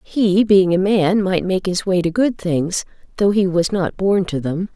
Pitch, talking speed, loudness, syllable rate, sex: 185 Hz, 225 wpm, -17 LUFS, 4.2 syllables/s, female